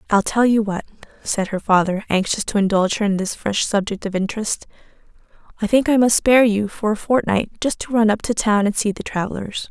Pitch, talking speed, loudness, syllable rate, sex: 210 Hz, 220 wpm, -19 LUFS, 5.8 syllables/s, female